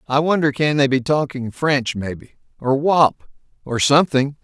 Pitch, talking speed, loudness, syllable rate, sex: 140 Hz, 160 wpm, -18 LUFS, 4.7 syllables/s, male